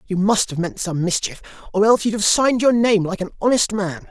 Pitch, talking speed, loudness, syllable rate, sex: 200 Hz, 250 wpm, -19 LUFS, 5.9 syllables/s, male